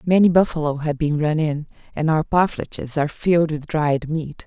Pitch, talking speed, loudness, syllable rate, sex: 155 Hz, 190 wpm, -20 LUFS, 5.1 syllables/s, female